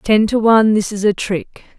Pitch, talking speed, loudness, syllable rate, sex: 210 Hz, 235 wpm, -15 LUFS, 4.9 syllables/s, female